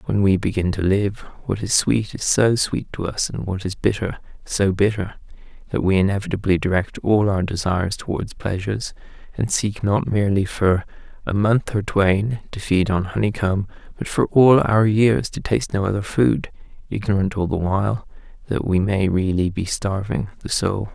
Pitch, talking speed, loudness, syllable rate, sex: 100 Hz, 180 wpm, -21 LUFS, 4.9 syllables/s, male